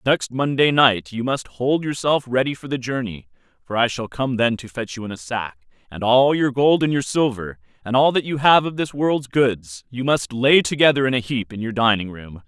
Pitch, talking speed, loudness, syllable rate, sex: 125 Hz, 235 wpm, -20 LUFS, 5.0 syllables/s, male